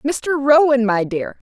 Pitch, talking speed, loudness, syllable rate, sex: 260 Hz, 160 wpm, -16 LUFS, 3.7 syllables/s, female